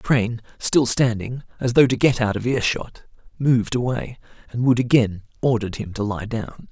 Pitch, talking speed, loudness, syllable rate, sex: 120 Hz, 190 wpm, -21 LUFS, 5.1 syllables/s, male